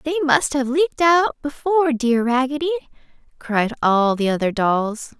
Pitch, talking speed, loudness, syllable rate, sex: 270 Hz, 150 wpm, -19 LUFS, 5.0 syllables/s, female